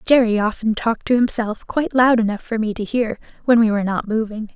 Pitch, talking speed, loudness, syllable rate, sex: 225 Hz, 225 wpm, -19 LUFS, 6.0 syllables/s, female